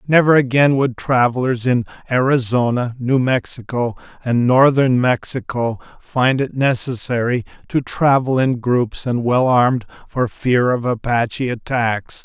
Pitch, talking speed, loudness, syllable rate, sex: 125 Hz, 125 wpm, -17 LUFS, 4.2 syllables/s, male